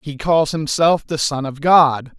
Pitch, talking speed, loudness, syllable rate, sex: 150 Hz, 190 wpm, -16 LUFS, 3.9 syllables/s, male